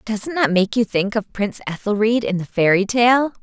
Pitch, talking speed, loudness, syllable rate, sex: 215 Hz, 210 wpm, -18 LUFS, 5.0 syllables/s, female